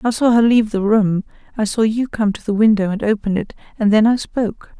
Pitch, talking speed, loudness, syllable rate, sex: 215 Hz, 250 wpm, -17 LUFS, 5.9 syllables/s, female